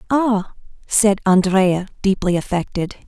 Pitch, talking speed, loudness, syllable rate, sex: 195 Hz, 95 wpm, -18 LUFS, 4.0 syllables/s, female